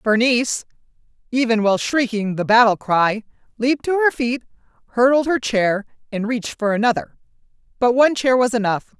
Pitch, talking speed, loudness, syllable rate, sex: 235 Hz, 155 wpm, -18 LUFS, 5.6 syllables/s, female